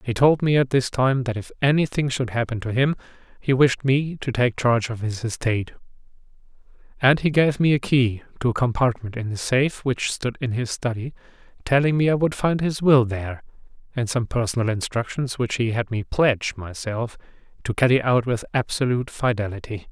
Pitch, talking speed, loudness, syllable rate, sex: 125 Hz, 190 wpm, -22 LUFS, 5.4 syllables/s, male